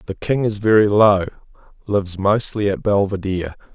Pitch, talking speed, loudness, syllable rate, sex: 100 Hz, 145 wpm, -18 LUFS, 5.3 syllables/s, male